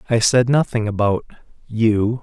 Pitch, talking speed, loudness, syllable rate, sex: 115 Hz, 110 wpm, -18 LUFS, 4.3 syllables/s, male